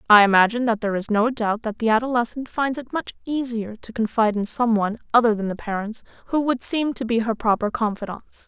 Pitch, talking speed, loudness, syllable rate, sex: 230 Hz, 220 wpm, -22 LUFS, 6.1 syllables/s, female